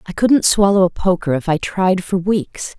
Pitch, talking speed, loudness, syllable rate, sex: 185 Hz, 215 wpm, -16 LUFS, 4.5 syllables/s, female